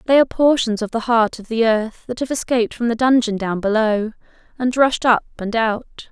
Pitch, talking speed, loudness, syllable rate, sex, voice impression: 230 Hz, 215 wpm, -18 LUFS, 5.2 syllables/s, female, feminine, slightly young, tensed, powerful, bright, clear, slightly intellectual, friendly, lively